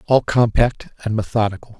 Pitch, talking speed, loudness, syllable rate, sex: 110 Hz, 135 wpm, -19 LUFS, 5.4 syllables/s, male